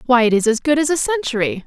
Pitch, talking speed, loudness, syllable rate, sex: 260 Hz, 290 wpm, -17 LUFS, 6.5 syllables/s, female